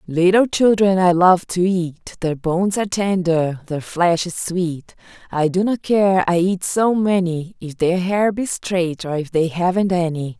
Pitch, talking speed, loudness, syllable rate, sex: 180 Hz, 185 wpm, -18 LUFS, 4.2 syllables/s, female